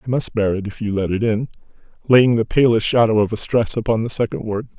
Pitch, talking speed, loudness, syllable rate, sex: 110 Hz, 250 wpm, -18 LUFS, 3.0 syllables/s, male